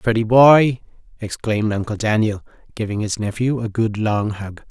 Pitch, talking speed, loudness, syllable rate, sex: 110 Hz, 155 wpm, -18 LUFS, 4.9 syllables/s, male